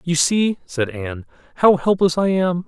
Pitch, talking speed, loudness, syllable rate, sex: 165 Hz, 180 wpm, -18 LUFS, 4.2 syllables/s, male